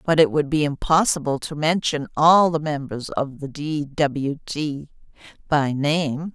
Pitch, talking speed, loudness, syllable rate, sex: 150 Hz, 160 wpm, -21 LUFS, 4.0 syllables/s, female